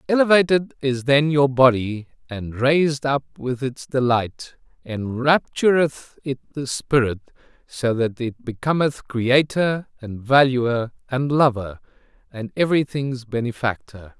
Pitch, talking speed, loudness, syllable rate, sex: 130 Hz, 115 wpm, -20 LUFS, 4.0 syllables/s, male